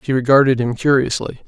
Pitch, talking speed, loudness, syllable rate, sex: 130 Hz, 165 wpm, -16 LUFS, 6.2 syllables/s, male